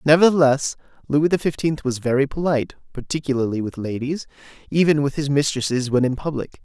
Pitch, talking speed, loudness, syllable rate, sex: 140 Hz, 155 wpm, -21 LUFS, 5.9 syllables/s, male